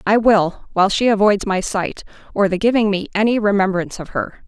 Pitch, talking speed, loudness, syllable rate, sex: 205 Hz, 200 wpm, -17 LUFS, 5.8 syllables/s, female